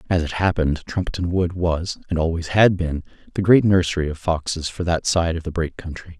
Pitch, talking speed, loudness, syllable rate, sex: 85 Hz, 215 wpm, -21 LUFS, 5.8 syllables/s, male